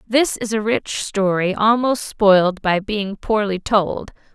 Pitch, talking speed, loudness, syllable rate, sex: 210 Hz, 150 wpm, -18 LUFS, 3.7 syllables/s, female